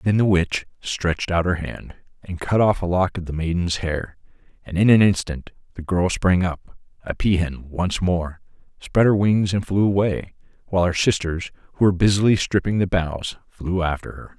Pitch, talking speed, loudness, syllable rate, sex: 90 Hz, 195 wpm, -21 LUFS, 4.9 syllables/s, male